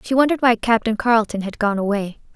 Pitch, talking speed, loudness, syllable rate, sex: 225 Hz, 205 wpm, -19 LUFS, 6.6 syllables/s, female